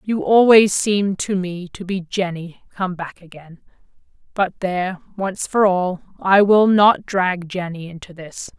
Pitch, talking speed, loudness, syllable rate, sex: 185 Hz, 160 wpm, -18 LUFS, 4.2 syllables/s, female